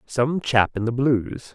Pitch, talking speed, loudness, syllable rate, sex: 125 Hz, 195 wpm, -21 LUFS, 3.6 syllables/s, male